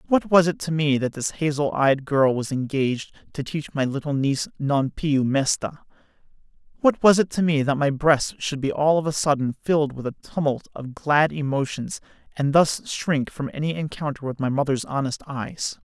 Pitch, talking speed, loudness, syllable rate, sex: 145 Hz, 195 wpm, -23 LUFS, 5.0 syllables/s, male